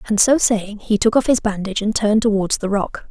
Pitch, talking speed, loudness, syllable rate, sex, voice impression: 210 Hz, 250 wpm, -18 LUFS, 5.8 syllables/s, female, very feminine, young, slightly adult-like, very thin, very relaxed, very weak, dark, very soft, slightly muffled, fluent, cute, intellectual, slightly sincere, calm, friendly, slightly reassuring, unique, elegant, sweet, slightly kind, very modest